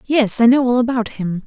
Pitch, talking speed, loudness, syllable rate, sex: 235 Hz, 245 wpm, -16 LUFS, 5.2 syllables/s, female